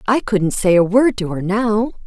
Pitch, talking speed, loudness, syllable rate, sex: 205 Hz, 230 wpm, -16 LUFS, 4.6 syllables/s, female